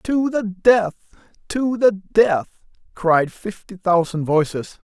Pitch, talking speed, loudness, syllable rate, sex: 195 Hz, 120 wpm, -19 LUFS, 3.4 syllables/s, male